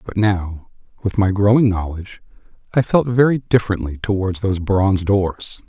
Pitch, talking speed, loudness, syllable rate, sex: 100 Hz, 150 wpm, -18 LUFS, 5.1 syllables/s, male